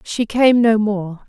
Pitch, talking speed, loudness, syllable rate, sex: 215 Hz, 190 wpm, -16 LUFS, 3.5 syllables/s, female